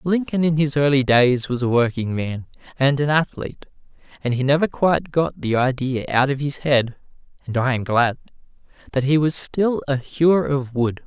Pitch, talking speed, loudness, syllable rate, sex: 135 Hz, 185 wpm, -20 LUFS, 4.9 syllables/s, male